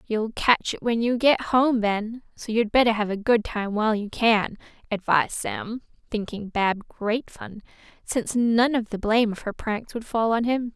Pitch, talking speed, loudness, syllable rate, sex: 225 Hz, 200 wpm, -24 LUFS, 4.5 syllables/s, female